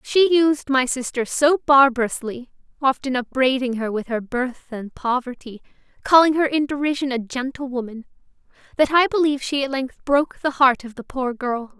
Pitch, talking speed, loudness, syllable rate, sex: 265 Hz, 170 wpm, -20 LUFS, 5.0 syllables/s, female